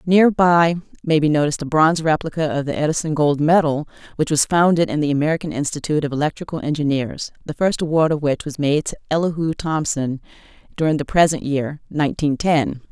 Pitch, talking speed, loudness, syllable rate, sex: 155 Hz, 180 wpm, -19 LUFS, 5.9 syllables/s, female